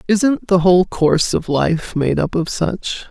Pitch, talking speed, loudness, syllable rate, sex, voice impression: 180 Hz, 195 wpm, -17 LUFS, 4.1 syllables/s, female, gender-neutral, slightly old, relaxed, weak, slightly dark, halting, raspy, calm, reassuring, kind, modest